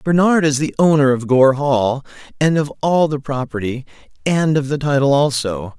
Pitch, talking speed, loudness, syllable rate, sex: 140 Hz, 175 wpm, -17 LUFS, 4.8 syllables/s, male